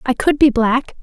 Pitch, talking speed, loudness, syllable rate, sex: 255 Hz, 235 wpm, -15 LUFS, 4.6 syllables/s, female